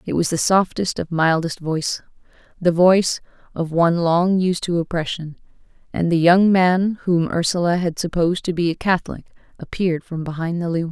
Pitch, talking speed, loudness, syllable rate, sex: 170 Hz, 165 wpm, -19 LUFS, 5.3 syllables/s, female